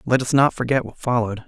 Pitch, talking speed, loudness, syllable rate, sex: 120 Hz, 245 wpm, -20 LUFS, 6.7 syllables/s, male